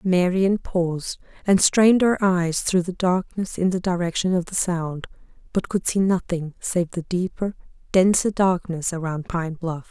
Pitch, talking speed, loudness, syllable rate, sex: 180 Hz, 165 wpm, -22 LUFS, 4.4 syllables/s, female